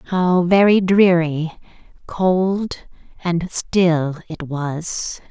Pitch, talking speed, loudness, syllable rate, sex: 175 Hz, 90 wpm, -18 LUFS, 2.4 syllables/s, female